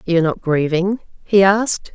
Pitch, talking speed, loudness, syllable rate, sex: 185 Hz, 155 wpm, -17 LUFS, 5.0 syllables/s, female